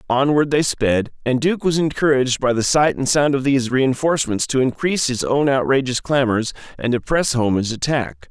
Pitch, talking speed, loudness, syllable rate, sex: 130 Hz, 195 wpm, -18 LUFS, 5.3 syllables/s, male